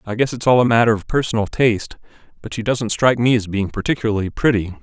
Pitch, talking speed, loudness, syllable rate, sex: 115 Hz, 225 wpm, -18 LUFS, 6.6 syllables/s, male